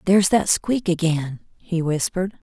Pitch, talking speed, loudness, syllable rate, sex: 175 Hz, 145 wpm, -21 LUFS, 4.8 syllables/s, female